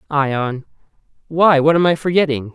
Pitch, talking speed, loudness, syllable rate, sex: 150 Hz, 140 wpm, -16 LUFS, 4.6 syllables/s, male